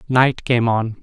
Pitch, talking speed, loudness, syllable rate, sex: 120 Hz, 175 wpm, -18 LUFS, 3.6 syllables/s, male